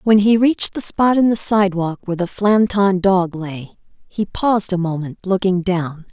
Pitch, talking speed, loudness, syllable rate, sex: 190 Hz, 185 wpm, -17 LUFS, 4.9 syllables/s, female